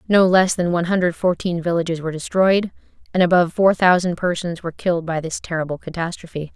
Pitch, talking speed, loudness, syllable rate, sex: 175 Hz, 185 wpm, -19 LUFS, 6.4 syllables/s, female